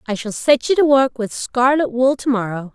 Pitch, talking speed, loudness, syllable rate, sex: 250 Hz, 240 wpm, -17 LUFS, 4.9 syllables/s, female